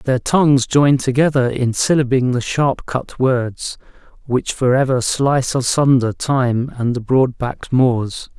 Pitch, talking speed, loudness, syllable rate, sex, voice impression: 130 Hz, 150 wpm, -17 LUFS, 4.0 syllables/s, male, very masculine, middle-aged, thick, tensed, slightly weak, slightly dark, slightly soft, clear, slightly fluent, slightly cool, intellectual, slightly refreshing, slightly sincere, calm, mature, slightly friendly, reassuring, slightly unique, slightly elegant, wild, slightly sweet, lively, kind, slightly intense